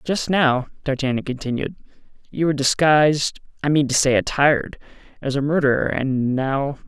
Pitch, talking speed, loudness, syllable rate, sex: 140 Hz, 130 wpm, -20 LUFS, 5.2 syllables/s, male